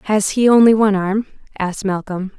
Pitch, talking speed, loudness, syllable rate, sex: 205 Hz, 175 wpm, -16 LUFS, 5.8 syllables/s, female